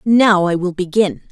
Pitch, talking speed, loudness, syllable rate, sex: 190 Hz, 180 wpm, -15 LUFS, 4.4 syllables/s, female